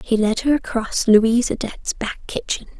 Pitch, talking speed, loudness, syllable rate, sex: 230 Hz, 170 wpm, -20 LUFS, 4.7 syllables/s, female